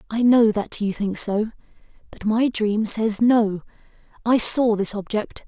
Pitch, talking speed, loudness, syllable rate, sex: 220 Hz, 155 wpm, -20 LUFS, 4.0 syllables/s, female